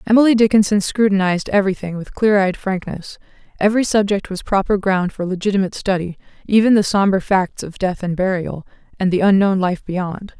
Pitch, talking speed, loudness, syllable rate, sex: 195 Hz, 165 wpm, -17 LUFS, 5.7 syllables/s, female